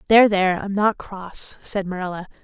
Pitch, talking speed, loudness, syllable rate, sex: 195 Hz, 175 wpm, -21 LUFS, 5.5 syllables/s, female